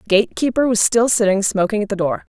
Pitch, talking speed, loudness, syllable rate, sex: 210 Hz, 230 wpm, -17 LUFS, 6.8 syllables/s, female